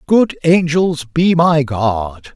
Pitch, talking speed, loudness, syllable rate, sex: 150 Hz, 130 wpm, -14 LUFS, 2.8 syllables/s, male